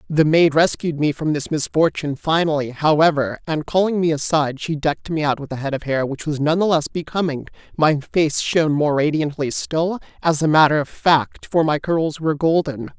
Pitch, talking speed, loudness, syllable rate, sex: 155 Hz, 205 wpm, -19 LUFS, 5.3 syllables/s, male